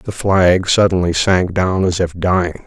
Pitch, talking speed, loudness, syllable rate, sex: 90 Hz, 180 wpm, -15 LUFS, 4.2 syllables/s, male